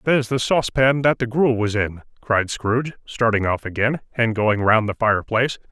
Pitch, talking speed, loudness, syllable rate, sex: 115 Hz, 190 wpm, -20 LUFS, 5.4 syllables/s, male